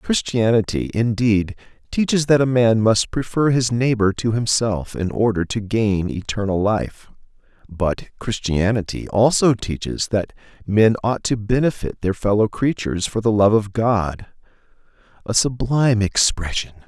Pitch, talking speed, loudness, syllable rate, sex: 110 Hz, 135 wpm, -19 LUFS, 4.4 syllables/s, male